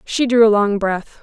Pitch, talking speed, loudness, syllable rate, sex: 215 Hz, 245 wpm, -15 LUFS, 4.5 syllables/s, female